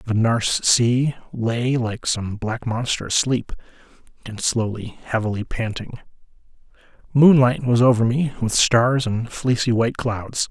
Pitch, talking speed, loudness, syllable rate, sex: 120 Hz, 130 wpm, -20 LUFS, 4.2 syllables/s, male